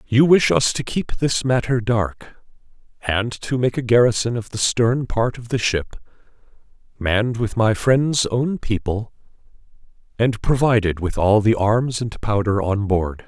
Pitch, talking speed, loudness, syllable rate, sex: 115 Hz, 165 wpm, -19 LUFS, 4.2 syllables/s, male